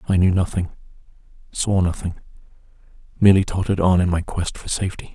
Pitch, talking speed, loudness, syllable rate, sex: 90 Hz, 150 wpm, -20 LUFS, 6.6 syllables/s, male